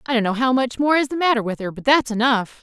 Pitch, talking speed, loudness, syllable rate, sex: 245 Hz, 320 wpm, -19 LUFS, 6.4 syllables/s, female